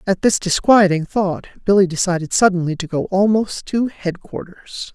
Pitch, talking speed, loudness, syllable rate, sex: 190 Hz, 145 wpm, -17 LUFS, 4.8 syllables/s, female